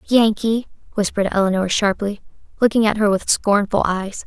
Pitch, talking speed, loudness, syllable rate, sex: 205 Hz, 140 wpm, -19 LUFS, 5.3 syllables/s, female